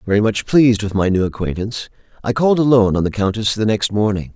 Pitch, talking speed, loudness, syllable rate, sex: 105 Hz, 220 wpm, -17 LUFS, 6.7 syllables/s, male